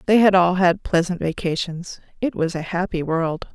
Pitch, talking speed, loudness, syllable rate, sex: 175 Hz, 185 wpm, -21 LUFS, 4.8 syllables/s, female